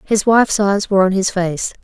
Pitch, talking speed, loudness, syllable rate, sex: 195 Hz, 230 wpm, -15 LUFS, 5.5 syllables/s, female